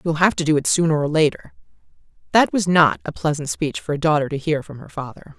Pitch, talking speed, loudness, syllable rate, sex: 155 Hz, 245 wpm, -19 LUFS, 6.1 syllables/s, female